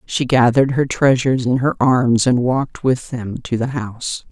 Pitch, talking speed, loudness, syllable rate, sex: 125 Hz, 195 wpm, -17 LUFS, 4.9 syllables/s, female